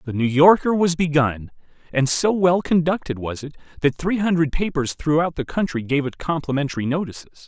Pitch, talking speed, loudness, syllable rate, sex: 155 Hz, 175 wpm, -20 LUFS, 5.6 syllables/s, male